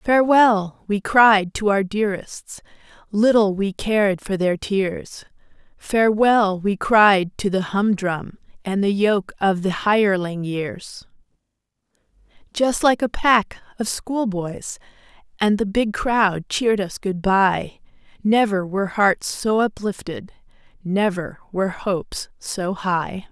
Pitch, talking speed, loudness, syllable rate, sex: 200 Hz, 130 wpm, -20 LUFS, 3.8 syllables/s, female